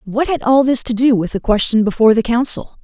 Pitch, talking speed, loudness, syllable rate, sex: 235 Hz, 255 wpm, -15 LUFS, 5.9 syllables/s, female